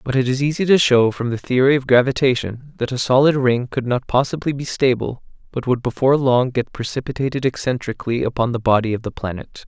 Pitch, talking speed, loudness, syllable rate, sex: 125 Hz, 205 wpm, -19 LUFS, 6.0 syllables/s, male